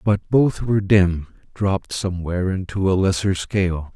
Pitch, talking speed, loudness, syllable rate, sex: 95 Hz, 150 wpm, -20 LUFS, 5.0 syllables/s, male